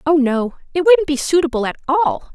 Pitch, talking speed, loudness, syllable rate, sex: 310 Hz, 205 wpm, -17 LUFS, 5.4 syllables/s, female